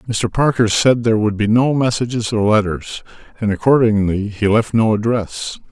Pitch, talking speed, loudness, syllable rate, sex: 110 Hz, 170 wpm, -16 LUFS, 4.9 syllables/s, male